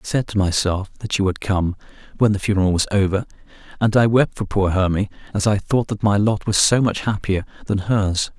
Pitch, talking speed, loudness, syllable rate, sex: 100 Hz, 220 wpm, -19 LUFS, 5.6 syllables/s, male